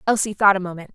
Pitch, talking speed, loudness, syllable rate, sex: 195 Hz, 255 wpm, -19 LUFS, 7.6 syllables/s, female